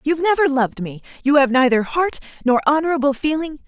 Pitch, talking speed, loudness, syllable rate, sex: 280 Hz, 195 wpm, -18 LUFS, 6.4 syllables/s, female